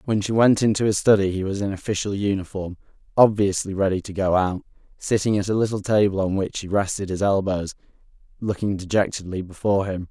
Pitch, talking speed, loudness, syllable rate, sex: 100 Hz, 185 wpm, -22 LUFS, 5.9 syllables/s, male